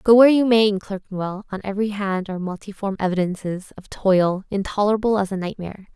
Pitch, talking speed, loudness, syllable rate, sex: 200 Hz, 180 wpm, -21 LUFS, 6.3 syllables/s, female